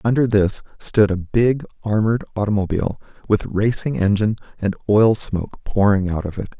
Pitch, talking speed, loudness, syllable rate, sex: 105 Hz, 155 wpm, -19 LUFS, 5.5 syllables/s, male